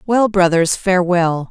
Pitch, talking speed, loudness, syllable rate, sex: 185 Hz, 120 wpm, -15 LUFS, 4.4 syllables/s, female